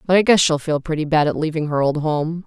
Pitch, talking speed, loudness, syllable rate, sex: 160 Hz, 290 wpm, -18 LUFS, 6.0 syllables/s, female